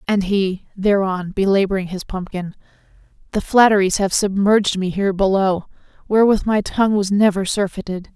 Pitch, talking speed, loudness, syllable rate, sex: 195 Hz, 140 wpm, -18 LUFS, 5.4 syllables/s, female